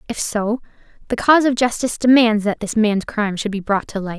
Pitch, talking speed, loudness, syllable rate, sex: 220 Hz, 230 wpm, -18 LUFS, 6.0 syllables/s, female